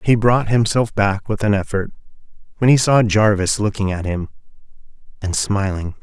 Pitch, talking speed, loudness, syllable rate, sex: 105 Hz, 160 wpm, -18 LUFS, 4.8 syllables/s, male